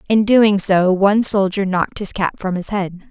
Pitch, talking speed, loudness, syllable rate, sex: 195 Hz, 215 wpm, -16 LUFS, 4.8 syllables/s, female